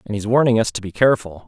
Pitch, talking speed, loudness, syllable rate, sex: 110 Hz, 285 wpm, -18 LUFS, 7.4 syllables/s, male